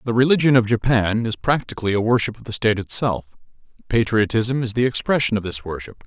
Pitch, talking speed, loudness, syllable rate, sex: 115 Hz, 190 wpm, -20 LUFS, 6.2 syllables/s, male